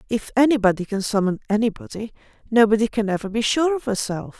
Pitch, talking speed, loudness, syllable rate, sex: 220 Hz, 165 wpm, -21 LUFS, 6.3 syllables/s, female